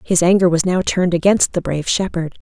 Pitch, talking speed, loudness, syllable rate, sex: 175 Hz, 220 wpm, -16 LUFS, 6.0 syllables/s, female